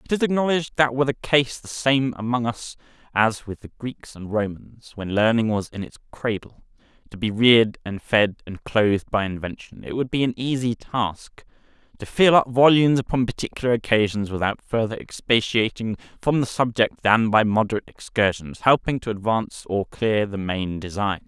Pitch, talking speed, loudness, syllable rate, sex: 115 Hz, 180 wpm, -22 LUFS, 5.2 syllables/s, male